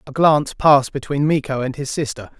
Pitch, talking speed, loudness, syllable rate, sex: 140 Hz, 200 wpm, -18 LUFS, 5.9 syllables/s, male